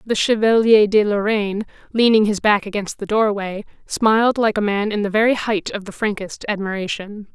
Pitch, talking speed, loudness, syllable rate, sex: 210 Hz, 180 wpm, -18 LUFS, 5.2 syllables/s, female